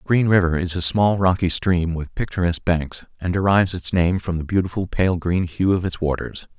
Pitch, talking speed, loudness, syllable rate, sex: 90 Hz, 210 wpm, -20 LUFS, 5.3 syllables/s, male